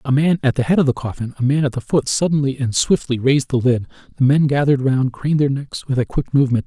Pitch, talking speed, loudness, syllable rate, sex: 135 Hz, 270 wpm, -18 LUFS, 6.5 syllables/s, male